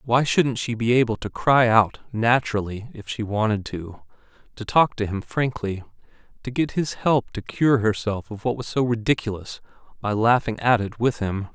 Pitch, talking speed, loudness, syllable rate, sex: 115 Hz, 185 wpm, -22 LUFS, 4.8 syllables/s, male